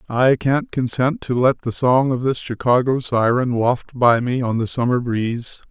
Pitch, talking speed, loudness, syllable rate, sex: 125 Hz, 190 wpm, -19 LUFS, 4.4 syllables/s, male